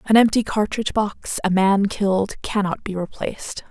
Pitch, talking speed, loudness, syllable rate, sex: 205 Hz, 160 wpm, -21 LUFS, 5.0 syllables/s, female